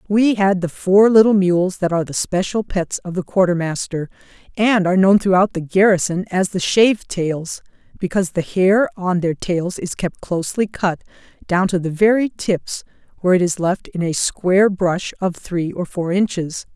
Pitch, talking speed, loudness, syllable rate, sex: 185 Hz, 185 wpm, -18 LUFS, 4.8 syllables/s, female